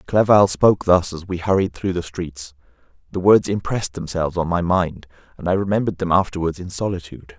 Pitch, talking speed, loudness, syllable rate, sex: 90 Hz, 185 wpm, -20 LUFS, 6.0 syllables/s, male